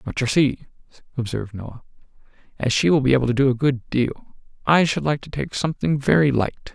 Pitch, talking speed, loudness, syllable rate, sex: 130 Hz, 205 wpm, -21 LUFS, 5.6 syllables/s, male